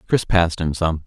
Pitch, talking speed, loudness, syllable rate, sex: 85 Hz, 225 wpm, -20 LUFS, 5.5 syllables/s, male